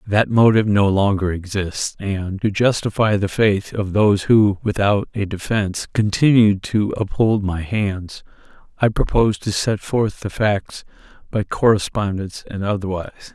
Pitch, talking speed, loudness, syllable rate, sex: 100 Hz, 145 wpm, -19 LUFS, 4.6 syllables/s, male